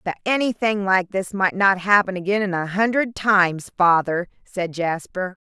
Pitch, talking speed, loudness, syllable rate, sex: 190 Hz, 165 wpm, -20 LUFS, 4.6 syllables/s, female